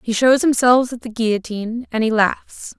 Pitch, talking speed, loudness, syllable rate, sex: 230 Hz, 195 wpm, -17 LUFS, 4.9 syllables/s, female